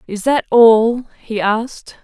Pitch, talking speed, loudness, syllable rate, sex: 230 Hz, 150 wpm, -14 LUFS, 3.4 syllables/s, female